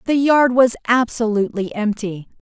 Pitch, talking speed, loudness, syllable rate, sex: 230 Hz, 125 wpm, -17 LUFS, 4.9 syllables/s, female